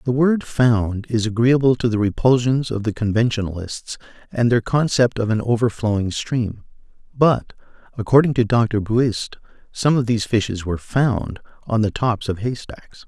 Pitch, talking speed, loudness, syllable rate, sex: 115 Hz, 150 wpm, -19 LUFS, 4.7 syllables/s, male